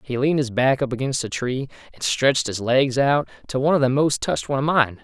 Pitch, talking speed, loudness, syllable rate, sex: 130 Hz, 260 wpm, -21 LUFS, 6.2 syllables/s, male